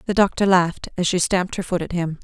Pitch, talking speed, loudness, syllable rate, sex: 180 Hz, 270 wpm, -20 LUFS, 6.4 syllables/s, female